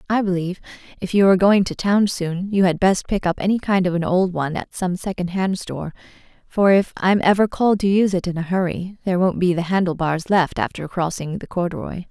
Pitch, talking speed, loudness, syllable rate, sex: 185 Hz, 225 wpm, -20 LUFS, 5.9 syllables/s, female